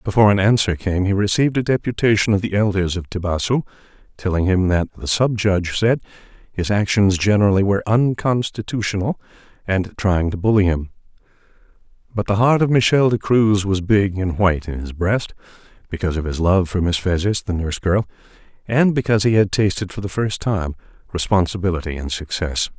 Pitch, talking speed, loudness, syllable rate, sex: 100 Hz, 170 wpm, -19 LUFS, 5.9 syllables/s, male